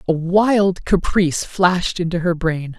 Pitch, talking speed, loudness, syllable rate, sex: 175 Hz, 150 wpm, -18 LUFS, 4.2 syllables/s, female